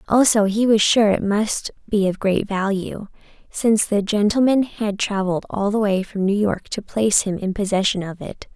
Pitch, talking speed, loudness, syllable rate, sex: 205 Hz, 195 wpm, -19 LUFS, 4.9 syllables/s, female